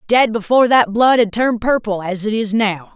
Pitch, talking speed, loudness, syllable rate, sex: 220 Hz, 205 wpm, -15 LUFS, 5.3 syllables/s, female